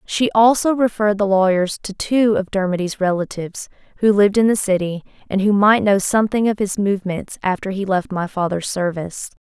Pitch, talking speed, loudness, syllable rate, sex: 200 Hz, 185 wpm, -18 LUFS, 5.6 syllables/s, female